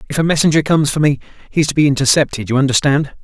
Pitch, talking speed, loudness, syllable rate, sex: 145 Hz, 240 wpm, -14 LUFS, 7.8 syllables/s, male